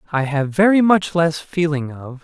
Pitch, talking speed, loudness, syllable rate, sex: 160 Hz, 190 wpm, -17 LUFS, 4.5 syllables/s, male